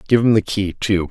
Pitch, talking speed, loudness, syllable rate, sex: 105 Hz, 270 wpm, -18 LUFS, 5.3 syllables/s, male